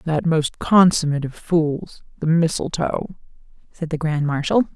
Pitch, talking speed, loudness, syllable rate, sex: 160 Hz, 140 wpm, -20 LUFS, 4.4 syllables/s, female